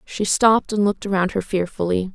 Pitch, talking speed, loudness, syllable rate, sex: 195 Hz, 195 wpm, -20 LUFS, 5.9 syllables/s, female